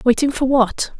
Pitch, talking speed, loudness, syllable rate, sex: 255 Hz, 180 wpm, -17 LUFS, 4.7 syllables/s, female